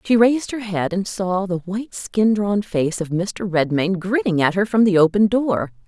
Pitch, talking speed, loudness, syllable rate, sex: 195 Hz, 215 wpm, -19 LUFS, 4.6 syllables/s, female